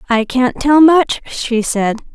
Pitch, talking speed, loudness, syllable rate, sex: 255 Hz, 170 wpm, -13 LUFS, 3.4 syllables/s, female